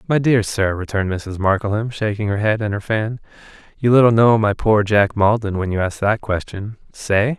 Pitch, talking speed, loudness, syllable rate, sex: 105 Hz, 205 wpm, -18 LUFS, 5.1 syllables/s, male